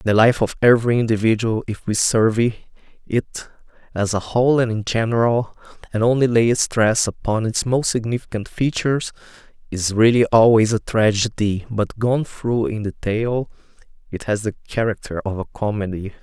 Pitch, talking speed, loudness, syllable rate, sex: 110 Hz, 150 wpm, -19 LUFS, 4.9 syllables/s, male